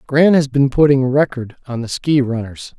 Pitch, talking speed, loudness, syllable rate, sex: 135 Hz, 195 wpm, -15 LUFS, 4.7 syllables/s, male